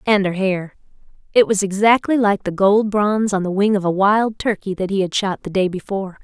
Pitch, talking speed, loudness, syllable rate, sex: 200 Hz, 220 wpm, -18 LUFS, 5.4 syllables/s, female